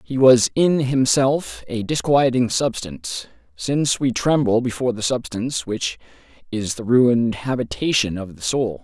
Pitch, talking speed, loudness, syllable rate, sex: 120 Hz, 145 wpm, -20 LUFS, 4.6 syllables/s, male